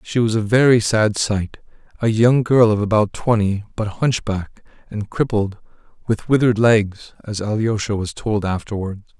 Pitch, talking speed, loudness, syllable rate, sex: 110 Hz, 155 wpm, -19 LUFS, 4.6 syllables/s, male